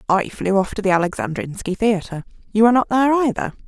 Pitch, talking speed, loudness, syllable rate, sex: 205 Hz, 195 wpm, -19 LUFS, 6.4 syllables/s, female